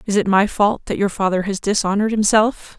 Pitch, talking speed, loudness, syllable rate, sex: 205 Hz, 215 wpm, -18 LUFS, 5.7 syllables/s, female